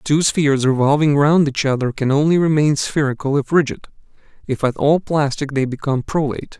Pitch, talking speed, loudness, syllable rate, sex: 145 Hz, 175 wpm, -17 LUFS, 5.7 syllables/s, male